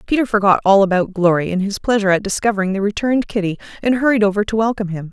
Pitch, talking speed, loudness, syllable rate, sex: 205 Hz, 225 wpm, -17 LUFS, 7.5 syllables/s, female